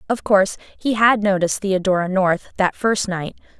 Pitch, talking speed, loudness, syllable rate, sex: 195 Hz, 165 wpm, -19 LUFS, 5.1 syllables/s, female